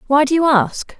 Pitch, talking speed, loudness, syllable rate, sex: 290 Hz, 240 wpm, -15 LUFS, 4.8 syllables/s, female